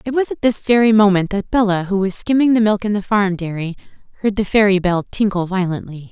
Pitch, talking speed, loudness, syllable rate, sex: 200 Hz, 225 wpm, -17 LUFS, 5.8 syllables/s, female